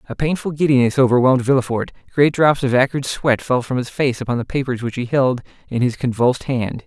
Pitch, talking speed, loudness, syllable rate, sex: 130 Hz, 210 wpm, -18 LUFS, 6.0 syllables/s, male